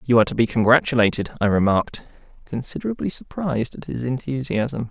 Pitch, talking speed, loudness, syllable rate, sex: 125 Hz, 145 wpm, -21 LUFS, 6.2 syllables/s, male